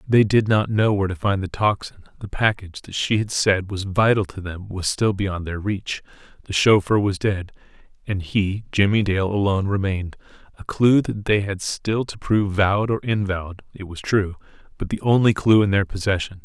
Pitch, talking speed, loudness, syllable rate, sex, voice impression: 100 Hz, 195 wpm, -21 LUFS, 5.2 syllables/s, male, masculine, very adult-like, slightly thick, cool, intellectual, slightly calm, slightly kind